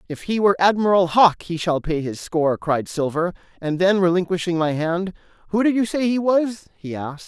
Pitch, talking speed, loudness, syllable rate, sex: 180 Hz, 205 wpm, -20 LUFS, 5.6 syllables/s, male